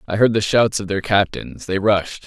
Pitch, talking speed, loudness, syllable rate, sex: 105 Hz, 240 wpm, -18 LUFS, 4.7 syllables/s, male